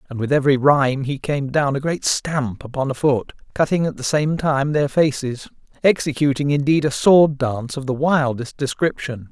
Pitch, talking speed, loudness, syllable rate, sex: 140 Hz, 180 wpm, -19 LUFS, 5.0 syllables/s, male